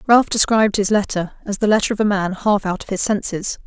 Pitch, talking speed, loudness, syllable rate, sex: 205 Hz, 245 wpm, -18 LUFS, 5.9 syllables/s, female